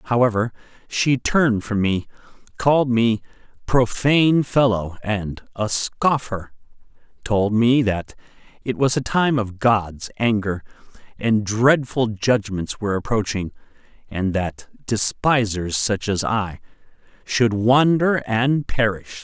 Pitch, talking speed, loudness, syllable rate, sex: 115 Hz, 115 wpm, -20 LUFS, 3.9 syllables/s, male